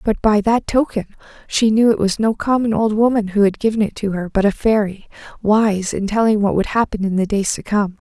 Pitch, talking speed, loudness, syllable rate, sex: 210 Hz, 240 wpm, -17 LUFS, 5.4 syllables/s, female